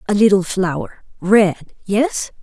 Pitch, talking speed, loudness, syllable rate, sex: 195 Hz, 75 wpm, -17 LUFS, 3.8 syllables/s, female